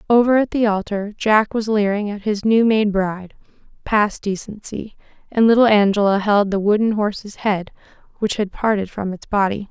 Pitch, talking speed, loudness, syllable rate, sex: 210 Hz, 175 wpm, -18 LUFS, 5.0 syllables/s, female